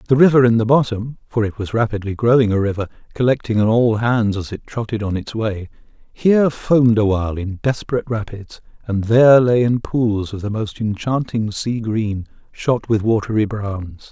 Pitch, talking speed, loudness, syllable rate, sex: 110 Hz, 185 wpm, -18 LUFS, 3.6 syllables/s, male